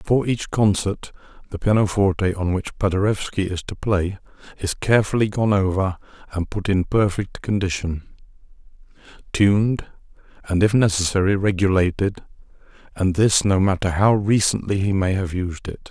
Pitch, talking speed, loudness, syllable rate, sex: 100 Hz, 130 wpm, -21 LUFS, 5.1 syllables/s, male